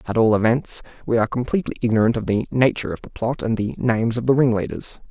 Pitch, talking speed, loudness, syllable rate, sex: 115 Hz, 225 wpm, -21 LUFS, 6.9 syllables/s, male